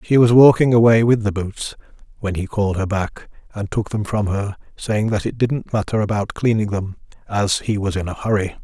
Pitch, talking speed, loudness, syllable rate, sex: 105 Hz, 215 wpm, -19 LUFS, 5.2 syllables/s, male